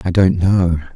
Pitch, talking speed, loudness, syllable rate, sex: 90 Hz, 190 wpm, -15 LUFS, 4.0 syllables/s, male